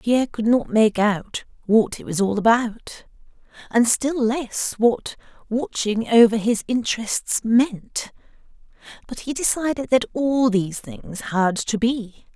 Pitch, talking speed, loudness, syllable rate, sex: 230 Hz, 140 wpm, -21 LUFS, 3.8 syllables/s, female